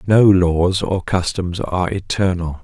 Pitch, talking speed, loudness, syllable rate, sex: 90 Hz, 135 wpm, -17 LUFS, 4.0 syllables/s, male